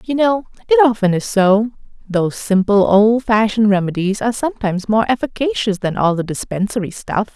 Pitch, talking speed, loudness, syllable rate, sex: 215 Hz, 145 wpm, -16 LUFS, 5.5 syllables/s, female